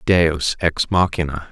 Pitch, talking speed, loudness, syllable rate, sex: 80 Hz, 120 wpm, -19 LUFS, 3.7 syllables/s, male